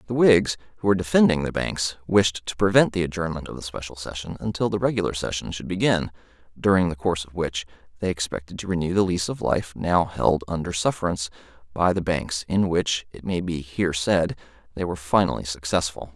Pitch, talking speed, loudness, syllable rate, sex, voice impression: 85 Hz, 195 wpm, -24 LUFS, 5.9 syllables/s, male, masculine, adult-like, slightly thick, slightly refreshing, slightly calm, slightly friendly